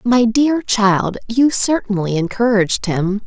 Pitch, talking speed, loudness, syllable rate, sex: 220 Hz, 130 wpm, -16 LUFS, 3.9 syllables/s, female